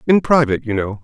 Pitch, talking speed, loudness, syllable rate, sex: 125 Hz, 230 wpm, -16 LUFS, 6.7 syllables/s, male